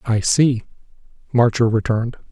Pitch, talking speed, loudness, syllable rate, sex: 120 Hz, 105 wpm, -18 LUFS, 5.0 syllables/s, male